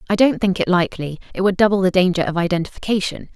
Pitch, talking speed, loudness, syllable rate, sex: 185 Hz, 215 wpm, -18 LUFS, 7.1 syllables/s, female